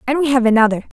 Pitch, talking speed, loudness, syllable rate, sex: 250 Hz, 240 wpm, -15 LUFS, 8.3 syllables/s, female